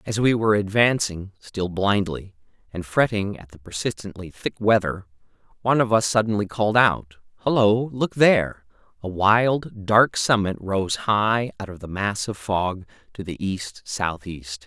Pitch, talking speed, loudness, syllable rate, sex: 100 Hz, 155 wpm, -22 LUFS, 4.4 syllables/s, male